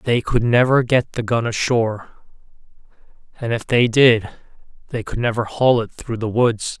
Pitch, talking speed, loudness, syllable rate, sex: 115 Hz, 170 wpm, -18 LUFS, 4.7 syllables/s, male